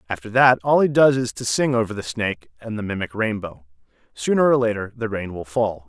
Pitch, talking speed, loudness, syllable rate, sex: 110 Hz, 225 wpm, -21 LUFS, 5.8 syllables/s, male